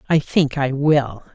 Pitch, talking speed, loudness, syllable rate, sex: 140 Hz, 180 wpm, -18 LUFS, 3.8 syllables/s, female